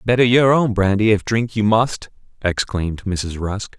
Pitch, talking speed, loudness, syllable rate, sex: 105 Hz, 175 wpm, -18 LUFS, 4.4 syllables/s, male